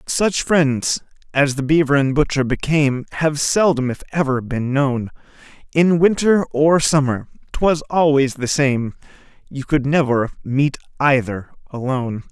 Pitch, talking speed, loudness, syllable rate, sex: 140 Hz, 135 wpm, -18 LUFS, 4.3 syllables/s, male